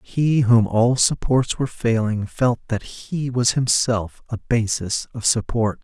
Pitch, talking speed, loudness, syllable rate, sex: 120 Hz, 155 wpm, -20 LUFS, 3.8 syllables/s, male